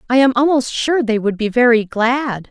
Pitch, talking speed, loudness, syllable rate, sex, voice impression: 240 Hz, 215 wpm, -15 LUFS, 4.8 syllables/s, female, feminine, slightly middle-aged, tensed, slightly hard, clear, fluent, intellectual, calm, reassuring, slightly elegant, lively, sharp